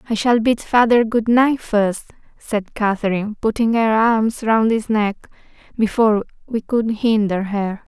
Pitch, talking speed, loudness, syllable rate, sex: 220 Hz, 150 wpm, -18 LUFS, 4.3 syllables/s, female